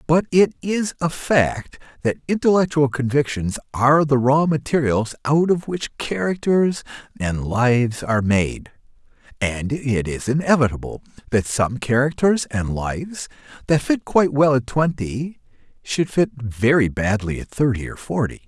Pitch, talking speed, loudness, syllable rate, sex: 135 Hz, 140 wpm, -20 LUFS, 4.4 syllables/s, male